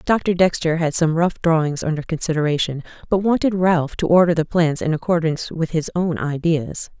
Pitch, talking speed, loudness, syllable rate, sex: 165 Hz, 180 wpm, -19 LUFS, 5.4 syllables/s, female